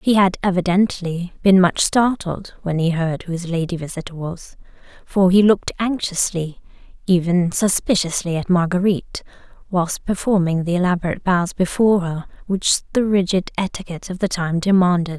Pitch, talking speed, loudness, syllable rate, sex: 180 Hz, 140 wpm, -19 LUFS, 5.1 syllables/s, female